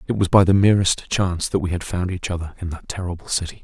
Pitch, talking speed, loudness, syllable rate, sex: 90 Hz, 265 wpm, -20 LUFS, 6.5 syllables/s, male